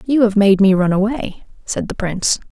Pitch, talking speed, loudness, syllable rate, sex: 205 Hz, 215 wpm, -16 LUFS, 5.2 syllables/s, female